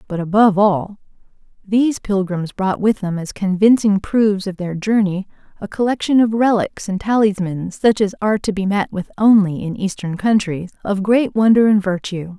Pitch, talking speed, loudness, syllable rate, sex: 200 Hz, 175 wpm, -17 LUFS, 3.8 syllables/s, female